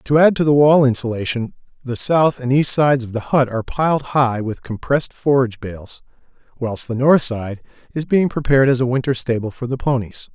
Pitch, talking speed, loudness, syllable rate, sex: 130 Hz, 205 wpm, -18 LUFS, 5.5 syllables/s, male